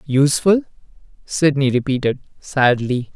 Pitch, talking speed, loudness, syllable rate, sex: 140 Hz, 75 wpm, -18 LUFS, 4.6 syllables/s, male